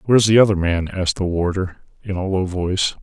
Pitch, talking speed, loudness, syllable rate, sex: 95 Hz, 220 wpm, -19 LUFS, 6.1 syllables/s, male